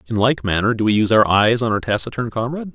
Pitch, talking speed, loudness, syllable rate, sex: 115 Hz, 260 wpm, -18 LUFS, 6.9 syllables/s, male